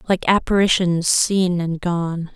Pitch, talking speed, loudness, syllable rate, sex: 180 Hz, 125 wpm, -18 LUFS, 3.7 syllables/s, female